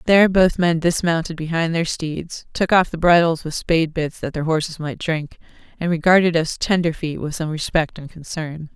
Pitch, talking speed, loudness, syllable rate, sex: 165 Hz, 190 wpm, -20 LUFS, 5.1 syllables/s, female